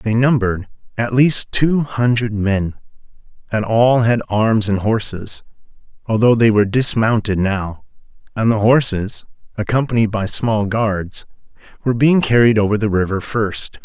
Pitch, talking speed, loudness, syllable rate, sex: 110 Hz, 140 wpm, -17 LUFS, 4.5 syllables/s, male